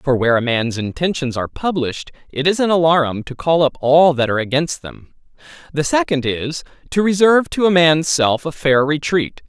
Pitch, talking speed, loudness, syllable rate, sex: 150 Hz, 195 wpm, -17 LUFS, 5.4 syllables/s, male